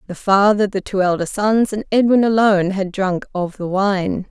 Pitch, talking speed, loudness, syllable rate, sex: 195 Hz, 195 wpm, -17 LUFS, 4.7 syllables/s, female